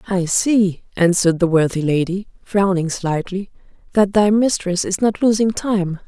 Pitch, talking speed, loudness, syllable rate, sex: 190 Hz, 150 wpm, -18 LUFS, 4.5 syllables/s, female